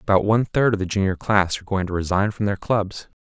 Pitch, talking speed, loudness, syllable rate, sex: 100 Hz, 260 wpm, -21 LUFS, 6.2 syllables/s, male